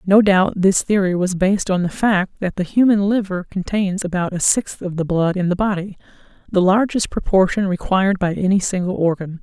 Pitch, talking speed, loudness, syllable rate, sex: 190 Hz, 195 wpm, -18 LUFS, 5.3 syllables/s, female